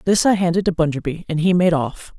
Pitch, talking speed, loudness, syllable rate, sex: 170 Hz, 250 wpm, -18 LUFS, 6.0 syllables/s, female